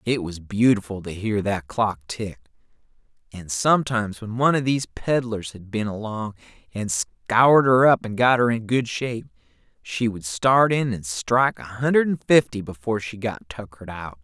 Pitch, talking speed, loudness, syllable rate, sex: 110 Hz, 180 wpm, -22 LUFS, 5.0 syllables/s, male